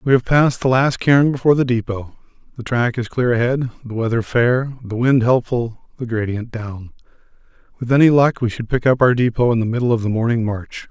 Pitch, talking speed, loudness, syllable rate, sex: 120 Hz, 210 wpm, -17 LUFS, 5.6 syllables/s, male